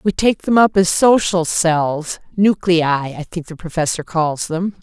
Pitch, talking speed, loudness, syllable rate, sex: 175 Hz, 175 wpm, -16 LUFS, 4.0 syllables/s, female